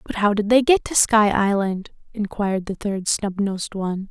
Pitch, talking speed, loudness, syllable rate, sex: 205 Hz, 190 wpm, -20 LUFS, 5.0 syllables/s, female